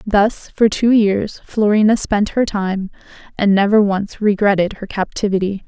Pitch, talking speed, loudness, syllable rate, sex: 205 Hz, 150 wpm, -16 LUFS, 4.4 syllables/s, female